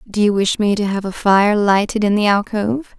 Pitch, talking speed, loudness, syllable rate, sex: 205 Hz, 240 wpm, -16 LUFS, 5.2 syllables/s, female